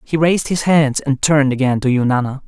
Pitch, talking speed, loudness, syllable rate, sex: 140 Hz, 220 wpm, -16 LUFS, 5.9 syllables/s, male